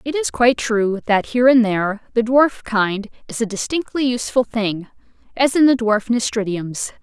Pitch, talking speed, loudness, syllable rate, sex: 230 Hz, 180 wpm, -18 LUFS, 5.0 syllables/s, female